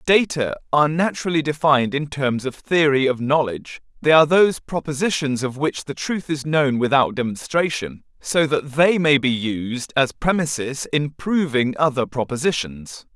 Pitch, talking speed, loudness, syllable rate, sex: 140 Hz, 155 wpm, -20 LUFS, 4.8 syllables/s, male